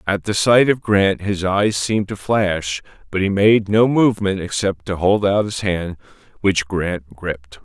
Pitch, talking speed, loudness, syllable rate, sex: 95 Hz, 190 wpm, -18 LUFS, 4.3 syllables/s, male